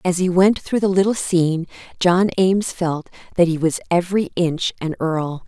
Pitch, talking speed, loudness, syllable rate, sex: 175 Hz, 185 wpm, -19 LUFS, 5.0 syllables/s, female